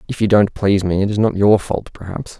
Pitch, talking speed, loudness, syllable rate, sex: 100 Hz, 275 wpm, -16 LUFS, 6.0 syllables/s, male